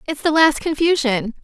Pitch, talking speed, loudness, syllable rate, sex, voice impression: 290 Hz, 165 wpm, -17 LUFS, 5.0 syllables/s, female, very feminine, young, very thin, tensed, slightly powerful, bright, slightly soft, clear, fluent, cute, intellectual, very refreshing, very sincere, slightly calm, friendly, very reassuring, unique, very elegant, very wild, lively, kind, modest